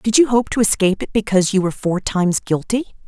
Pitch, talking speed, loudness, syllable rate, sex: 205 Hz, 235 wpm, -18 LUFS, 6.7 syllables/s, female